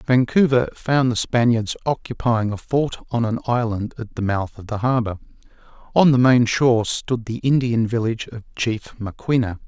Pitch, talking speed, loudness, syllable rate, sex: 115 Hz, 165 wpm, -20 LUFS, 4.8 syllables/s, male